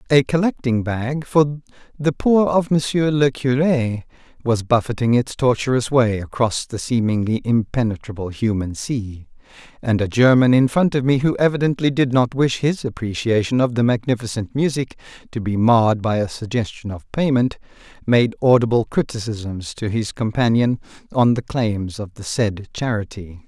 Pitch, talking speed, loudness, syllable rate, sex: 120 Hz, 155 wpm, -19 LUFS, 4.8 syllables/s, male